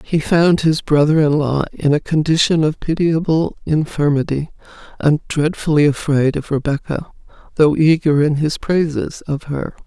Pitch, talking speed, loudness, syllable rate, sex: 150 Hz, 140 wpm, -17 LUFS, 4.5 syllables/s, female